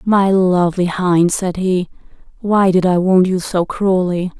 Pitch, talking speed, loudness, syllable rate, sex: 185 Hz, 165 wpm, -15 LUFS, 4.0 syllables/s, female